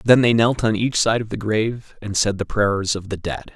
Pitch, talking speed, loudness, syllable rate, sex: 105 Hz, 270 wpm, -20 LUFS, 5.0 syllables/s, male